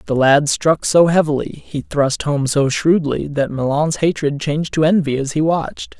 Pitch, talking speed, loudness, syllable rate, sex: 150 Hz, 190 wpm, -17 LUFS, 4.7 syllables/s, male